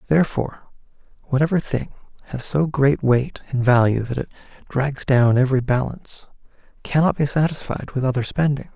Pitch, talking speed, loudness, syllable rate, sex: 135 Hz, 145 wpm, -20 LUFS, 5.5 syllables/s, male